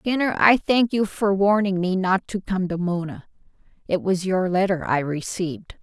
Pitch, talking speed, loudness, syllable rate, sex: 190 Hz, 175 wpm, -22 LUFS, 4.6 syllables/s, female